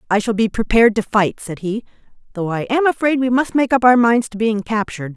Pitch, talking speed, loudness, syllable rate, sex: 225 Hz, 245 wpm, -17 LUFS, 5.9 syllables/s, female